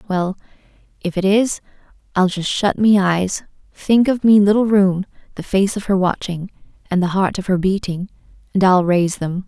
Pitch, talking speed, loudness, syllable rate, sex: 190 Hz, 185 wpm, -17 LUFS, 4.9 syllables/s, female